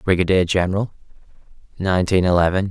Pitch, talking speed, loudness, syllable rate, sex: 90 Hz, 90 wpm, -19 LUFS, 6.6 syllables/s, male